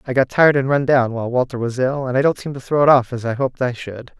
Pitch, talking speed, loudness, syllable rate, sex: 130 Hz, 330 wpm, -18 LUFS, 6.7 syllables/s, male